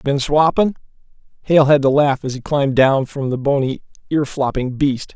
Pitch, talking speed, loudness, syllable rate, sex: 140 Hz, 185 wpm, -17 LUFS, 4.8 syllables/s, male